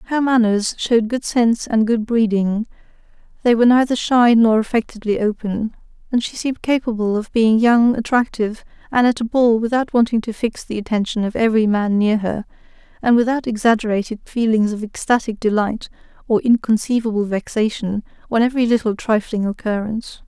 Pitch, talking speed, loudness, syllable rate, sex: 225 Hz, 155 wpm, -18 LUFS, 5.5 syllables/s, female